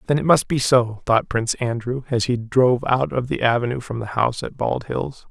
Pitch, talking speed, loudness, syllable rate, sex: 125 Hz, 235 wpm, -21 LUFS, 5.4 syllables/s, male